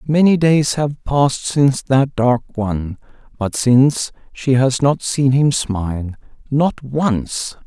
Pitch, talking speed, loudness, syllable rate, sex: 130 Hz, 135 wpm, -17 LUFS, 3.7 syllables/s, male